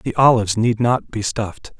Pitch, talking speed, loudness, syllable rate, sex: 115 Hz, 200 wpm, -18 LUFS, 5.3 syllables/s, male